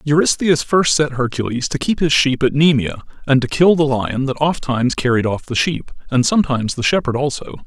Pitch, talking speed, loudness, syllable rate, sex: 140 Hz, 205 wpm, -17 LUFS, 5.6 syllables/s, male